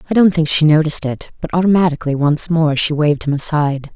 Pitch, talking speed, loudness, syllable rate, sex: 155 Hz, 210 wpm, -15 LUFS, 6.6 syllables/s, female